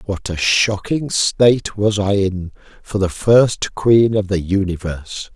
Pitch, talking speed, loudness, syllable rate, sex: 100 Hz, 155 wpm, -17 LUFS, 3.9 syllables/s, male